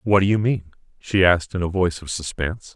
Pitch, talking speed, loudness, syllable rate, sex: 90 Hz, 240 wpm, -21 LUFS, 6.5 syllables/s, male